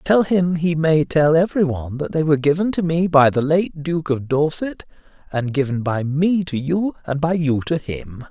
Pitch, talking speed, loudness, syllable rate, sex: 155 Hz, 215 wpm, -19 LUFS, 4.9 syllables/s, male